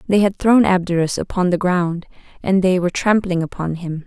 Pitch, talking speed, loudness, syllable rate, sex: 185 Hz, 190 wpm, -18 LUFS, 5.3 syllables/s, female